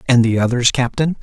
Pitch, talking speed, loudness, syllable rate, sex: 125 Hz, 195 wpm, -16 LUFS, 5.8 syllables/s, male